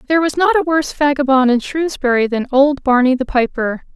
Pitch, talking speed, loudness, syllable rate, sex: 275 Hz, 195 wpm, -15 LUFS, 5.8 syllables/s, female